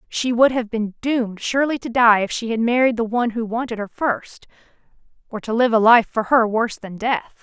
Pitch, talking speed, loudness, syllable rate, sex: 230 Hz, 220 wpm, -19 LUFS, 5.4 syllables/s, female